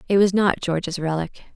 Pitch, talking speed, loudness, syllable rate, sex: 180 Hz, 195 wpm, -21 LUFS, 5.6 syllables/s, female